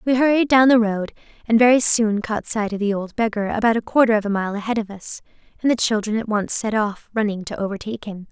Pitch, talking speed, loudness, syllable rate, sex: 220 Hz, 245 wpm, -19 LUFS, 6.1 syllables/s, female